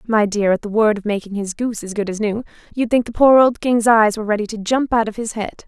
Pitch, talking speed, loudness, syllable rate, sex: 220 Hz, 295 wpm, -18 LUFS, 6.1 syllables/s, female